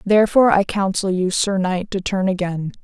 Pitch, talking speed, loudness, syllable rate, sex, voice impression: 195 Hz, 190 wpm, -18 LUFS, 5.3 syllables/s, female, feminine, adult-like, slightly relaxed, slightly weak, slightly dark, soft, fluent, raspy, calm, friendly, reassuring, elegant, slightly lively, kind, modest